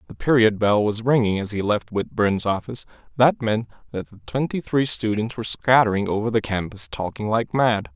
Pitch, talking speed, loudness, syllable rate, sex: 110 Hz, 190 wpm, -21 LUFS, 5.4 syllables/s, male